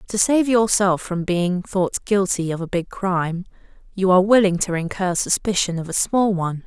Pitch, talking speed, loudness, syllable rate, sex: 190 Hz, 190 wpm, -20 LUFS, 5.0 syllables/s, female